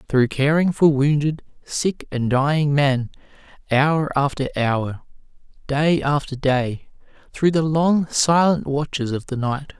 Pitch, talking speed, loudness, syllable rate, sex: 145 Hz, 135 wpm, -20 LUFS, 3.8 syllables/s, male